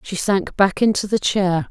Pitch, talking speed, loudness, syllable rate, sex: 190 Hz, 210 wpm, -19 LUFS, 4.4 syllables/s, female